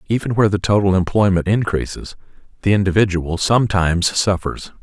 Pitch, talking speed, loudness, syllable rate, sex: 100 Hz, 125 wpm, -17 LUFS, 5.8 syllables/s, male